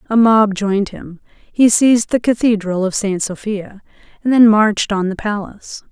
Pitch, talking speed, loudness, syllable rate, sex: 210 Hz, 170 wpm, -15 LUFS, 4.9 syllables/s, female